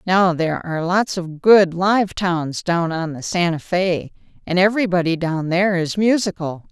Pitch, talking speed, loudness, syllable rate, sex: 175 Hz, 170 wpm, -19 LUFS, 4.7 syllables/s, female